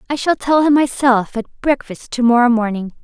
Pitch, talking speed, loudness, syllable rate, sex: 250 Hz, 200 wpm, -16 LUFS, 5.0 syllables/s, female